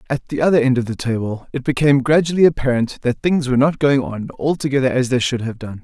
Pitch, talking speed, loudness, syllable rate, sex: 130 Hz, 235 wpm, -18 LUFS, 6.3 syllables/s, male